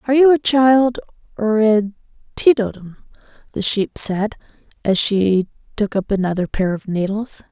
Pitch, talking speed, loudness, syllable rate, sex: 215 Hz, 145 wpm, -17 LUFS, 4.2 syllables/s, female